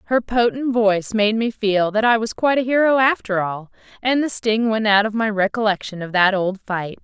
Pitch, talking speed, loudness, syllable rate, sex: 215 Hz, 220 wpm, -19 LUFS, 5.2 syllables/s, female